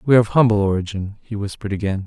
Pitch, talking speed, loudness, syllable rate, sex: 105 Hz, 230 wpm, -20 LUFS, 7.5 syllables/s, male